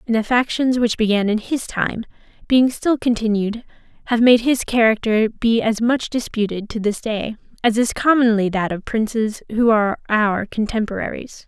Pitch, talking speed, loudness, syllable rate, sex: 225 Hz, 165 wpm, -19 LUFS, 4.8 syllables/s, female